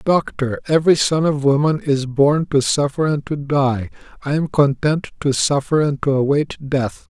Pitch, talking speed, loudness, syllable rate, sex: 145 Hz, 175 wpm, -18 LUFS, 4.6 syllables/s, male